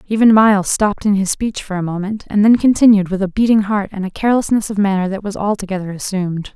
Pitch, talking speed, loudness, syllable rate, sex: 200 Hz, 230 wpm, -15 LUFS, 6.5 syllables/s, female